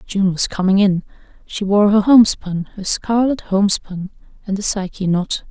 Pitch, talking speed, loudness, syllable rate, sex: 200 Hz, 155 wpm, -17 LUFS, 4.9 syllables/s, female